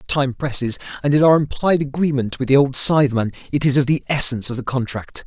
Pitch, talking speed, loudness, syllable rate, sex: 135 Hz, 215 wpm, -18 LUFS, 6.0 syllables/s, male